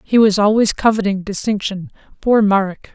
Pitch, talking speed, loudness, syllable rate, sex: 205 Hz, 145 wpm, -16 LUFS, 5.1 syllables/s, female